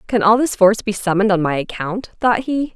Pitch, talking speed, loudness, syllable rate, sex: 210 Hz, 240 wpm, -17 LUFS, 5.9 syllables/s, female